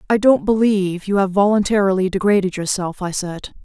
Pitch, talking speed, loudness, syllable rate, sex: 195 Hz, 165 wpm, -17 LUFS, 5.6 syllables/s, female